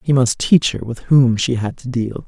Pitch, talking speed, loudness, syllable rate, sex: 125 Hz, 265 wpm, -17 LUFS, 4.6 syllables/s, male